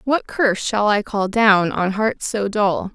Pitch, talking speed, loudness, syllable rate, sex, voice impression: 210 Hz, 205 wpm, -18 LUFS, 3.9 syllables/s, female, feminine, adult-like, tensed, slightly bright, clear, slightly raspy, calm, friendly, reassuring, kind, slightly modest